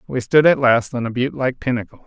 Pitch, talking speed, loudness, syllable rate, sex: 130 Hz, 235 wpm, -18 LUFS, 6.8 syllables/s, male